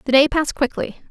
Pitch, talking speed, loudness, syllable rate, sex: 275 Hz, 215 wpm, -19 LUFS, 6.5 syllables/s, female